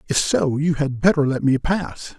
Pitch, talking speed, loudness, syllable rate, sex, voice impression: 150 Hz, 220 wpm, -20 LUFS, 4.5 syllables/s, male, very masculine, very adult-like, old, tensed, slightly weak, slightly bright, soft, muffled, slightly fluent, raspy, cool, very intellectual, sincere, calm, friendly, reassuring, unique, slightly elegant, wild, slightly sweet, slightly lively, strict, slightly modest